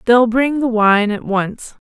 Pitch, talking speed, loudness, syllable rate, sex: 230 Hz, 195 wpm, -15 LUFS, 3.7 syllables/s, female